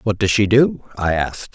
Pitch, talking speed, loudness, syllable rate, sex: 110 Hz, 235 wpm, -18 LUFS, 5.2 syllables/s, male